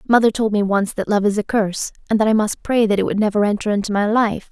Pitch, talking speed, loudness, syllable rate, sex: 210 Hz, 290 wpm, -18 LUFS, 6.5 syllables/s, female